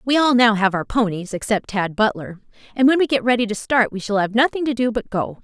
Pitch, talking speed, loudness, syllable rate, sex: 225 Hz, 265 wpm, -19 LUFS, 5.9 syllables/s, female